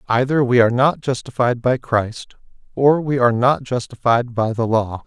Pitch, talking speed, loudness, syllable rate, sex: 125 Hz, 180 wpm, -18 LUFS, 4.9 syllables/s, male